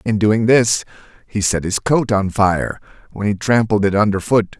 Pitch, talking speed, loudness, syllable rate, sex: 105 Hz, 195 wpm, -17 LUFS, 4.5 syllables/s, male